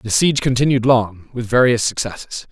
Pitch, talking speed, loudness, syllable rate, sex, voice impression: 120 Hz, 165 wpm, -16 LUFS, 4.9 syllables/s, male, masculine, adult-like, slightly powerful, fluent, slightly sincere, slightly unique, slightly intense